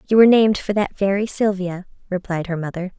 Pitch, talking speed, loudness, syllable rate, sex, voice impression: 195 Hz, 200 wpm, -19 LUFS, 6.2 syllables/s, female, feminine, adult-like, slightly tensed, slightly powerful, soft, slightly raspy, cute, friendly, reassuring, elegant, lively